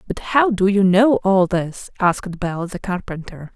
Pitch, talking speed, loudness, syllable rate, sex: 190 Hz, 185 wpm, -18 LUFS, 4.2 syllables/s, female